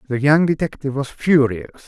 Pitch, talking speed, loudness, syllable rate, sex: 140 Hz, 160 wpm, -18 LUFS, 5.8 syllables/s, male